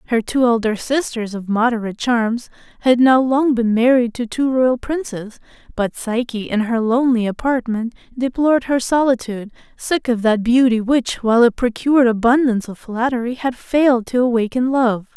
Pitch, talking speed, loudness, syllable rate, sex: 240 Hz, 160 wpm, -17 LUFS, 5.1 syllables/s, female